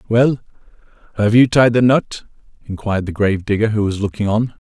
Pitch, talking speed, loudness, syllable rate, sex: 110 Hz, 180 wpm, -16 LUFS, 5.9 syllables/s, male